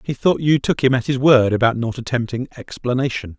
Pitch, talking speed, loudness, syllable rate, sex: 125 Hz, 215 wpm, -18 LUFS, 5.5 syllables/s, male